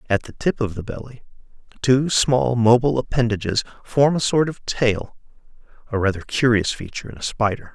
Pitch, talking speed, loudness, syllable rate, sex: 120 Hz, 170 wpm, -20 LUFS, 5.5 syllables/s, male